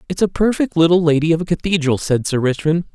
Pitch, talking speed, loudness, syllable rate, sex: 165 Hz, 225 wpm, -17 LUFS, 6.3 syllables/s, male